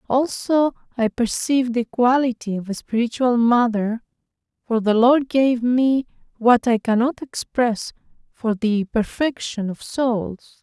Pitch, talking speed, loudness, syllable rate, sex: 240 Hz, 130 wpm, -20 LUFS, 4.0 syllables/s, female